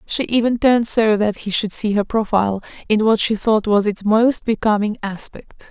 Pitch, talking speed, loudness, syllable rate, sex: 215 Hz, 200 wpm, -18 LUFS, 5.0 syllables/s, female